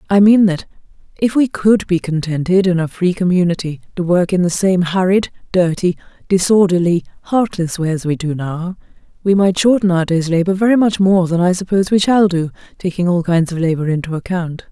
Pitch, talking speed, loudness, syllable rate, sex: 180 Hz, 195 wpm, -15 LUFS, 5.5 syllables/s, female